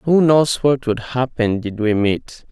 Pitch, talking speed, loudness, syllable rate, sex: 125 Hz, 190 wpm, -18 LUFS, 3.7 syllables/s, male